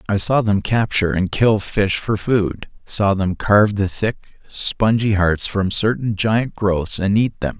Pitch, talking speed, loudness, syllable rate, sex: 105 Hz, 180 wpm, -18 LUFS, 4.1 syllables/s, male